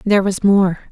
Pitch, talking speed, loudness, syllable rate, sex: 195 Hz, 195 wpm, -15 LUFS, 5.6 syllables/s, female